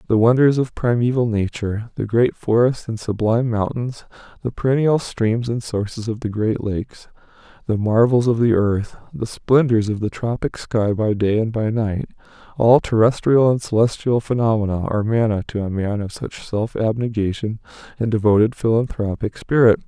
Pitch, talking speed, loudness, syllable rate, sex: 115 Hz, 160 wpm, -19 LUFS, 5.1 syllables/s, male